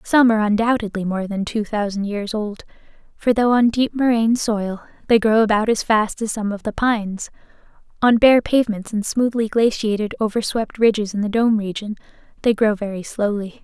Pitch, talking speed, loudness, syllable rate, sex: 220 Hz, 180 wpm, -19 LUFS, 5.3 syllables/s, female